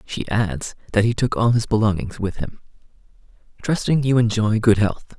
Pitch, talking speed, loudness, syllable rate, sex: 110 Hz, 160 wpm, -20 LUFS, 5.0 syllables/s, male